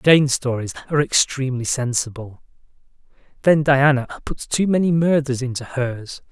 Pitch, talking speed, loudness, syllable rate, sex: 135 Hz, 125 wpm, -19 LUFS, 5.1 syllables/s, male